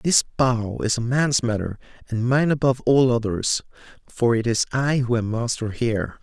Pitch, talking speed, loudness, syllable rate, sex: 120 Hz, 185 wpm, -22 LUFS, 4.9 syllables/s, male